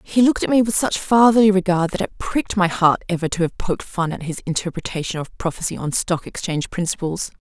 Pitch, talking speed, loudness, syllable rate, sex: 180 Hz, 220 wpm, -20 LUFS, 6.2 syllables/s, female